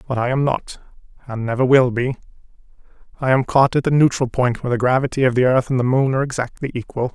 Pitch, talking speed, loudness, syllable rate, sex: 125 Hz, 225 wpm, -18 LUFS, 6.6 syllables/s, male